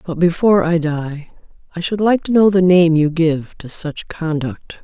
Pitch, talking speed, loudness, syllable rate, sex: 170 Hz, 200 wpm, -16 LUFS, 4.5 syllables/s, female